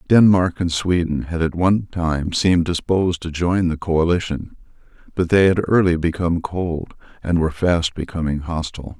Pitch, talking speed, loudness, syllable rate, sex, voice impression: 85 Hz, 160 wpm, -19 LUFS, 5.1 syllables/s, male, masculine, adult-like, slightly thick, cool, calm, slightly wild